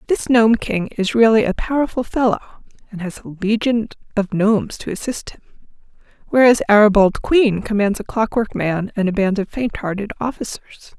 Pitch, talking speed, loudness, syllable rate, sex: 215 Hz, 175 wpm, -18 LUFS, 5.0 syllables/s, female